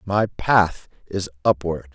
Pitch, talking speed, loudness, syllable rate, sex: 90 Hz, 125 wpm, -21 LUFS, 3.3 syllables/s, male